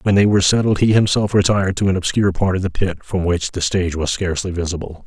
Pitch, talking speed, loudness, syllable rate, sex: 95 Hz, 250 wpm, -18 LUFS, 6.6 syllables/s, male